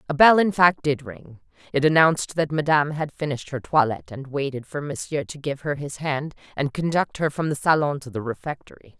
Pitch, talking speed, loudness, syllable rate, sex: 145 Hz, 215 wpm, -23 LUFS, 5.8 syllables/s, female